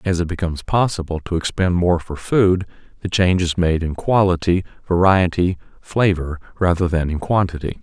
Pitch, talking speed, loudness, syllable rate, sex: 90 Hz, 160 wpm, -19 LUFS, 5.2 syllables/s, male